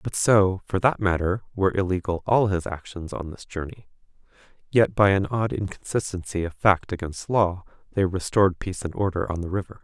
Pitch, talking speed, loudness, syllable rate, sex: 95 Hz, 185 wpm, -24 LUFS, 5.4 syllables/s, male